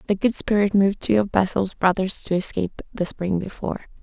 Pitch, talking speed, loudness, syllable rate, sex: 195 Hz, 195 wpm, -22 LUFS, 5.9 syllables/s, female